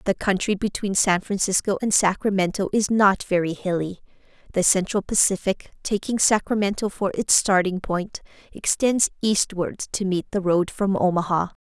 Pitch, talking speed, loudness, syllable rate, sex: 195 Hz, 145 wpm, -22 LUFS, 4.8 syllables/s, female